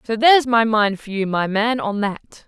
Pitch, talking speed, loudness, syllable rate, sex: 220 Hz, 240 wpm, -18 LUFS, 4.7 syllables/s, female